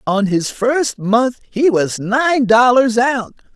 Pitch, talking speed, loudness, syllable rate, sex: 235 Hz, 150 wpm, -15 LUFS, 3.1 syllables/s, male